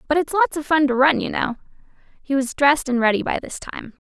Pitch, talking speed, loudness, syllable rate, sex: 280 Hz, 250 wpm, -20 LUFS, 6.0 syllables/s, female